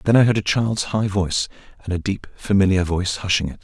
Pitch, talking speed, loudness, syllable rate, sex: 95 Hz, 230 wpm, -20 LUFS, 6.2 syllables/s, male